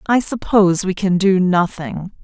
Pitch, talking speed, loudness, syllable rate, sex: 190 Hz, 160 wpm, -16 LUFS, 4.4 syllables/s, female